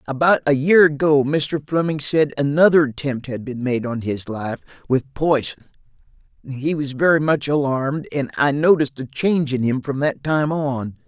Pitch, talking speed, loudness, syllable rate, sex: 140 Hz, 180 wpm, -19 LUFS, 4.8 syllables/s, male